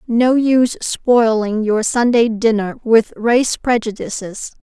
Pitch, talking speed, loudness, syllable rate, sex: 230 Hz, 115 wpm, -16 LUFS, 3.7 syllables/s, female